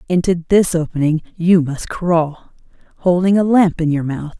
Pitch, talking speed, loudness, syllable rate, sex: 170 Hz, 165 wpm, -16 LUFS, 4.5 syllables/s, female